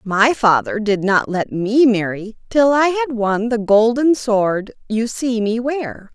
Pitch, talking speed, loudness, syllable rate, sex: 225 Hz, 175 wpm, -17 LUFS, 3.7 syllables/s, female